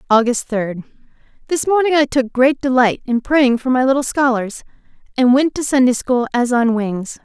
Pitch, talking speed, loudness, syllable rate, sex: 255 Hz, 175 wpm, -16 LUFS, 4.9 syllables/s, female